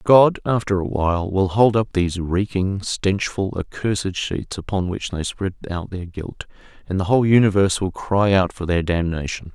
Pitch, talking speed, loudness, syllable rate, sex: 95 Hz, 180 wpm, -21 LUFS, 4.9 syllables/s, male